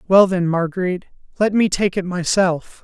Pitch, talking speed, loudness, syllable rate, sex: 185 Hz, 170 wpm, -18 LUFS, 5.2 syllables/s, male